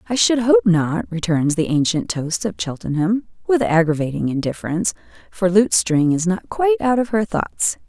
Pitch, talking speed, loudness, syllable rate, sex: 195 Hz, 170 wpm, -19 LUFS, 5.1 syllables/s, female